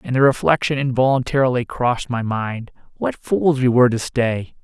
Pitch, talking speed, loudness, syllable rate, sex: 125 Hz, 155 wpm, -19 LUFS, 5.2 syllables/s, male